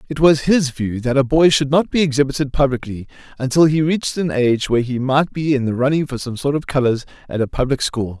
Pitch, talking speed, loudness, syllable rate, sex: 135 Hz, 240 wpm, -18 LUFS, 5.9 syllables/s, male